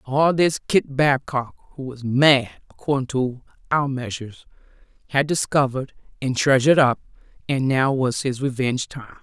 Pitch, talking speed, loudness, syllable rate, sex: 135 Hz, 145 wpm, -21 LUFS, 5.9 syllables/s, female